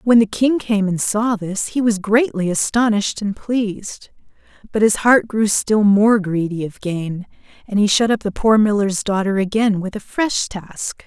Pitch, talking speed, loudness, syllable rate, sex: 210 Hz, 190 wpm, -18 LUFS, 4.4 syllables/s, female